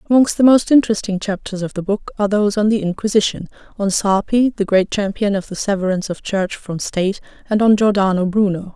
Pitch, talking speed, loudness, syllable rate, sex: 200 Hz, 200 wpm, -17 LUFS, 6.1 syllables/s, female